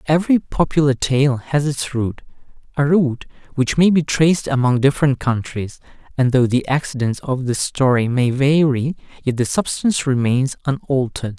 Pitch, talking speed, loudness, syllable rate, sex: 135 Hz, 155 wpm, -18 LUFS, 4.9 syllables/s, male